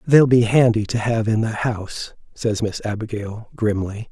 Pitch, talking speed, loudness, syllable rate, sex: 110 Hz, 175 wpm, -20 LUFS, 4.5 syllables/s, male